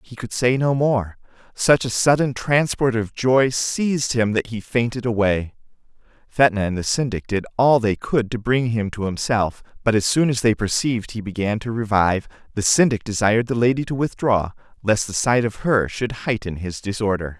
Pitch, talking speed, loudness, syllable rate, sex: 115 Hz, 195 wpm, -20 LUFS, 5.0 syllables/s, male